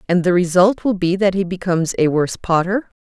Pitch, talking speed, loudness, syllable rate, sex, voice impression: 180 Hz, 220 wpm, -17 LUFS, 5.9 syllables/s, female, feminine, very adult-like, slightly clear, slightly intellectual, elegant